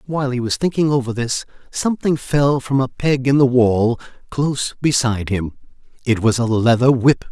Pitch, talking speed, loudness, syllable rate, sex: 130 Hz, 180 wpm, -18 LUFS, 5.2 syllables/s, male